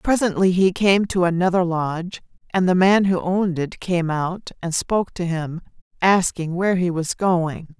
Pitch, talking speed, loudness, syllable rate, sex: 180 Hz, 175 wpm, -20 LUFS, 4.6 syllables/s, female